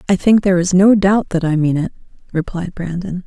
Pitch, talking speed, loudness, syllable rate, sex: 180 Hz, 220 wpm, -15 LUFS, 5.6 syllables/s, female